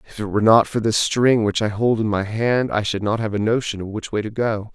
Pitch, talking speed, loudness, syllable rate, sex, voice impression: 110 Hz, 290 wpm, -20 LUFS, 5.5 syllables/s, male, very masculine, very adult-like, thick, tensed, powerful, slightly bright, soft, fluent, cool, very intellectual, refreshing, sincere, very calm, very mature, very friendly, very reassuring, unique, elegant, very wild, very sweet, lively, very kind, slightly modest